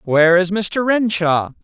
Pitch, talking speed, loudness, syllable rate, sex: 185 Hz, 145 wpm, -16 LUFS, 4.1 syllables/s, male